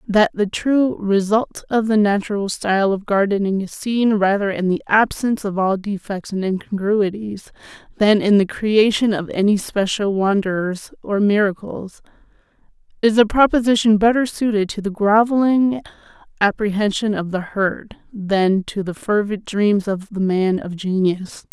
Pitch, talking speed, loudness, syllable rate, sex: 205 Hz, 150 wpm, -18 LUFS, 4.4 syllables/s, female